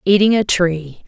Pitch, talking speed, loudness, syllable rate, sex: 185 Hz, 165 wpm, -15 LUFS, 4.1 syllables/s, female